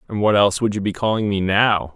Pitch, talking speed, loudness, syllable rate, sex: 100 Hz, 275 wpm, -18 LUFS, 6.2 syllables/s, male